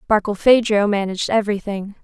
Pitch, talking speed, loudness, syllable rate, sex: 205 Hz, 90 wpm, -18 LUFS, 6.2 syllables/s, female